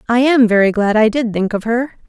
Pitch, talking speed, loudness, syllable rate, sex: 230 Hz, 260 wpm, -14 LUFS, 5.5 syllables/s, female